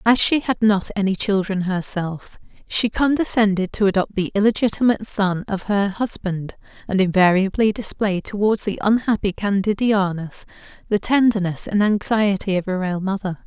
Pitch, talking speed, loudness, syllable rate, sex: 200 Hz, 145 wpm, -20 LUFS, 5.0 syllables/s, female